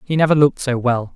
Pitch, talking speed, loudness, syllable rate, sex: 135 Hz, 260 wpm, -17 LUFS, 6.8 syllables/s, male